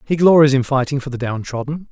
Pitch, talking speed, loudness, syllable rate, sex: 140 Hz, 220 wpm, -17 LUFS, 6.1 syllables/s, male